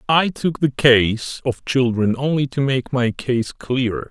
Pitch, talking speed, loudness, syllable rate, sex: 130 Hz, 175 wpm, -19 LUFS, 3.8 syllables/s, male